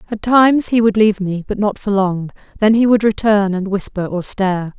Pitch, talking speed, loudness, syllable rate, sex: 205 Hz, 225 wpm, -15 LUFS, 5.4 syllables/s, female